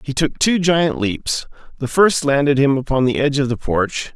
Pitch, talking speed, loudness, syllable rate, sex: 140 Hz, 215 wpm, -17 LUFS, 4.8 syllables/s, male